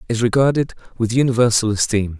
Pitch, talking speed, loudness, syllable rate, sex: 115 Hz, 135 wpm, -18 LUFS, 6.3 syllables/s, male